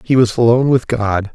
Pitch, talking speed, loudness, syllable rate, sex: 115 Hz, 225 wpm, -14 LUFS, 5.6 syllables/s, male